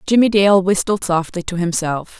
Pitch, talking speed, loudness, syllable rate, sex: 185 Hz, 165 wpm, -16 LUFS, 4.8 syllables/s, female